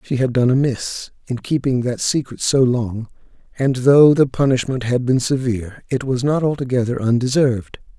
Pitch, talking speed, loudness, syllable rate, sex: 130 Hz, 165 wpm, -18 LUFS, 5.0 syllables/s, male